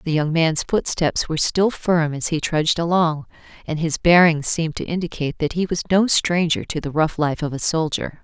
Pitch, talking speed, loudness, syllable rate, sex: 160 Hz, 210 wpm, -20 LUFS, 5.2 syllables/s, female